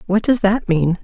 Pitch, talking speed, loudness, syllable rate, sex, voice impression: 195 Hz, 235 wpm, -17 LUFS, 4.7 syllables/s, female, feminine, middle-aged, slightly relaxed, slightly weak, soft, fluent, intellectual, friendly, elegant, lively, strict, sharp